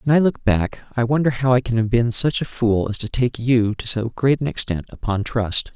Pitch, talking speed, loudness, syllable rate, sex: 120 Hz, 260 wpm, -20 LUFS, 5.1 syllables/s, male